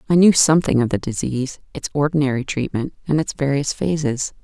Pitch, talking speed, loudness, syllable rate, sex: 140 Hz, 175 wpm, -19 LUFS, 5.9 syllables/s, female